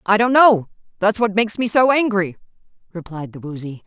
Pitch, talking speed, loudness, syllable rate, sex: 200 Hz, 185 wpm, -17 LUFS, 5.5 syllables/s, female